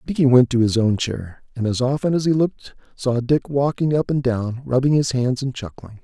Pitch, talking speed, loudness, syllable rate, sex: 130 Hz, 230 wpm, -20 LUFS, 5.2 syllables/s, male